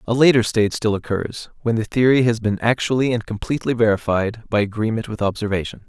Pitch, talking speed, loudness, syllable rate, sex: 115 Hz, 185 wpm, -20 LUFS, 6.2 syllables/s, male